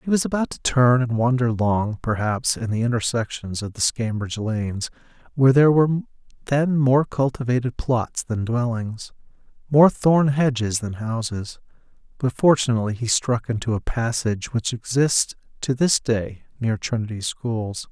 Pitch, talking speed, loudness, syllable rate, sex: 120 Hz, 150 wpm, -21 LUFS, 4.8 syllables/s, male